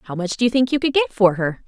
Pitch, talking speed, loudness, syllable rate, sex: 230 Hz, 360 wpm, -19 LUFS, 6.1 syllables/s, female